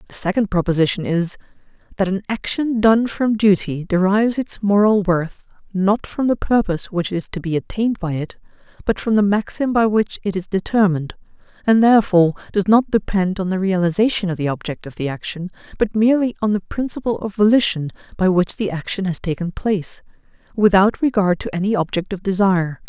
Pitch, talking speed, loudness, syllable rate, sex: 195 Hz, 180 wpm, -19 LUFS, 5.6 syllables/s, female